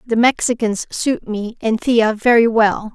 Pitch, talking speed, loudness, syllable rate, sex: 225 Hz, 165 wpm, -16 LUFS, 4.2 syllables/s, female